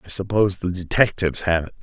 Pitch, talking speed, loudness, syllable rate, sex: 90 Hz, 195 wpm, -20 LUFS, 6.6 syllables/s, male